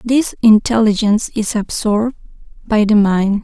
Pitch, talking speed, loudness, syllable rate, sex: 215 Hz, 120 wpm, -14 LUFS, 4.8 syllables/s, female